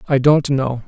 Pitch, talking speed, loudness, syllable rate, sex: 140 Hz, 205 wpm, -16 LUFS, 4.4 syllables/s, male